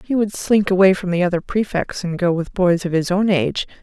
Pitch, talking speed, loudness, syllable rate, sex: 185 Hz, 250 wpm, -18 LUFS, 5.6 syllables/s, female